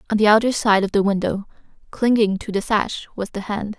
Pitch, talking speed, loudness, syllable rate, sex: 210 Hz, 220 wpm, -20 LUFS, 5.7 syllables/s, female